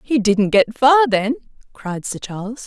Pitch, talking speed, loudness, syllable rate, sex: 230 Hz, 180 wpm, -17 LUFS, 4.1 syllables/s, female